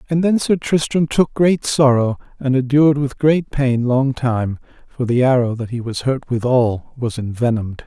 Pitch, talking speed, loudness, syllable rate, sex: 130 Hz, 185 wpm, -17 LUFS, 4.6 syllables/s, male